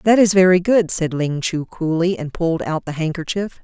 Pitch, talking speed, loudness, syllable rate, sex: 175 Hz, 215 wpm, -18 LUFS, 5.1 syllables/s, female